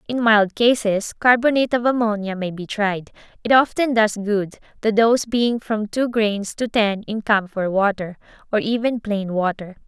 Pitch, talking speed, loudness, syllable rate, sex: 215 Hz, 170 wpm, -20 LUFS, 4.6 syllables/s, female